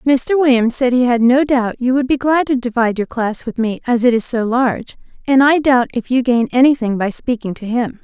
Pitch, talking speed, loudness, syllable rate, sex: 250 Hz, 245 wpm, -15 LUFS, 5.4 syllables/s, female